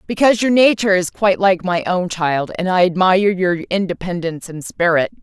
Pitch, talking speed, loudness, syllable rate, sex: 185 Hz, 185 wpm, -16 LUFS, 5.6 syllables/s, female